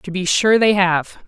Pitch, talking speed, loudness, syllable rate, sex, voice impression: 190 Hz, 235 wpm, -16 LUFS, 4.3 syllables/s, female, feminine, adult-like, slightly relaxed, slightly powerful, raspy, intellectual, slightly calm, lively, slightly strict, sharp